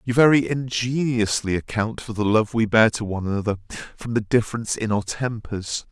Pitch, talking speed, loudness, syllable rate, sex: 110 Hz, 185 wpm, -22 LUFS, 5.6 syllables/s, male